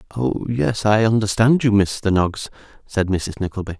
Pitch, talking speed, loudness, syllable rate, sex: 100 Hz, 160 wpm, -19 LUFS, 4.6 syllables/s, male